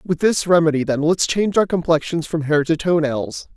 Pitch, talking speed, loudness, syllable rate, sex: 160 Hz, 220 wpm, -18 LUFS, 5.3 syllables/s, male